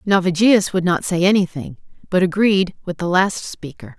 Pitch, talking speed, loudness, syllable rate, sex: 180 Hz, 165 wpm, -17 LUFS, 4.9 syllables/s, female